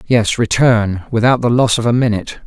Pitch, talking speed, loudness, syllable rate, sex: 115 Hz, 195 wpm, -14 LUFS, 5.3 syllables/s, male